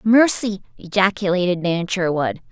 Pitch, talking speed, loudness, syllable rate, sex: 190 Hz, 95 wpm, -19 LUFS, 4.6 syllables/s, female